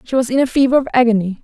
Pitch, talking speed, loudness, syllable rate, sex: 245 Hz, 295 wpm, -15 LUFS, 7.5 syllables/s, female